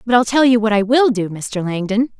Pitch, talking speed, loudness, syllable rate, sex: 225 Hz, 275 wpm, -16 LUFS, 5.4 syllables/s, female